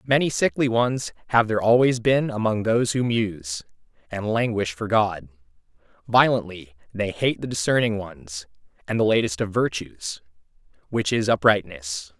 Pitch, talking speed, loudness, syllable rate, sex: 105 Hz, 145 wpm, -22 LUFS, 4.7 syllables/s, male